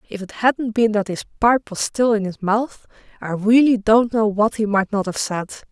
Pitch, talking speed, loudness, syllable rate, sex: 215 Hz, 230 wpm, -19 LUFS, 4.7 syllables/s, female